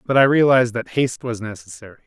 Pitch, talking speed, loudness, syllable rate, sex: 125 Hz, 205 wpm, -18 LUFS, 6.8 syllables/s, male